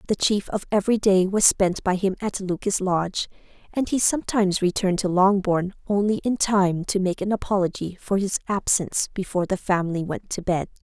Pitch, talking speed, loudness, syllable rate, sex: 190 Hz, 185 wpm, -23 LUFS, 5.6 syllables/s, female